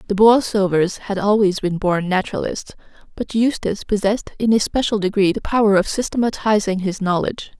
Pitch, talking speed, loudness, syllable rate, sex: 205 Hz, 160 wpm, -18 LUFS, 5.7 syllables/s, female